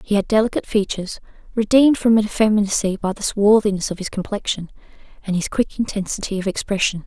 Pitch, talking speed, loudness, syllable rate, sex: 205 Hz, 160 wpm, -19 LUFS, 6.4 syllables/s, female